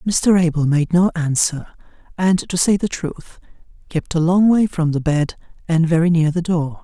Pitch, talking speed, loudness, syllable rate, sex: 170 Hz, 195 wpm, -18 LUFS, 4.8 syllables/s, male